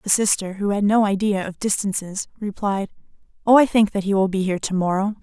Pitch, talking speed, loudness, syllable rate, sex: 200 Hz, 220 wpm, -20 LUFS, 5.8 syllables/s, female